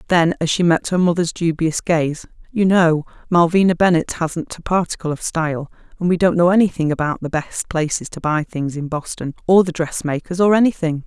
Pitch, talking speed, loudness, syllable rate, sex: 165 Hz, 195 wpm, -18 LUFS, 5.3 syllables/s, female